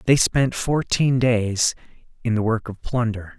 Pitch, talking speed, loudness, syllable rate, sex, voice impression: 115 Hz, 160 wpm, -21 LUFS, 4.0 syllables/s, male, masculine, very adult-like, cool, slightly refreshing, calm, friendly, slightly kind